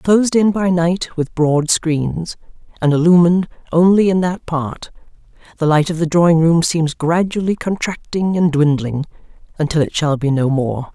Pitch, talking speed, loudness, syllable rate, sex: 165 Hz, 165 wpm, -16 LUFS, 4.7 syllables/s, female